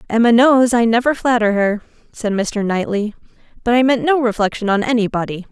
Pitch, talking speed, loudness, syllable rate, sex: 225 Hz, 185 wpm, -16 LUFS, 5.5 syllables/s, female